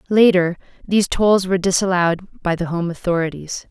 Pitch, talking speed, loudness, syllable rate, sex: 180 Hz, 145 wpm, -18 LUFS, 5.8 syllables/s, female